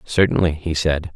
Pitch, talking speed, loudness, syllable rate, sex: 80 Hz, 155 wpm, -19 LUFS, 4.8 syllables/s, male